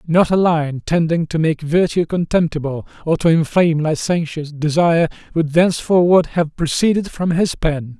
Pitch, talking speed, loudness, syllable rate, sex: 165 Hz, 150 wpm, -17 LUFS, 4.9 syllables/s, male